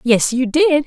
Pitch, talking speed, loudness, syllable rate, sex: 275 Hz, 210 wpm, -15 LUFS, 3.9 syllables/s, female